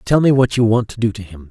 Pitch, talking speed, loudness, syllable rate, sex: 115 Hz, 360 wpm, -16 LUFS, 6.4 syllables/s, male